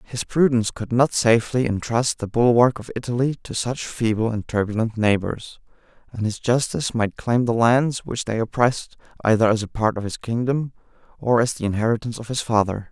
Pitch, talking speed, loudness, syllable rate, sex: 115 Hz, 185 wpm, -21 LUFS, 5.5 syllables/s, male